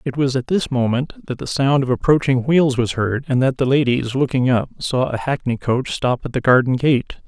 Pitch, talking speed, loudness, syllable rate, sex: 130 Hz, 230 wpm, -18 LUFS, 5.1 syllables/s, male